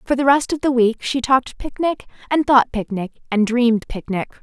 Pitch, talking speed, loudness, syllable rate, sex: 250 Hz, 215 wpm, -19 LUFS, 5.7 syllables/s, female